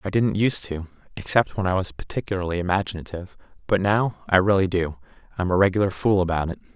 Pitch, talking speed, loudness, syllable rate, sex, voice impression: 95 Hz, 170 wpm, -23 LUFS, 6.5 syllables/s, male, masculine, adult-like, cool, slightly intellectual, slightly refreshing, calm